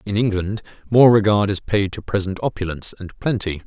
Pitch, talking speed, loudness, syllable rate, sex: 100 Hz, 180 wpm, -19 LUFS, 5.6 syllables/s, male